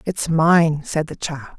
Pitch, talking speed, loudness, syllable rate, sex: 165 Hz, 190 wpm, -19 LUFS, 3.9 syllables/s, female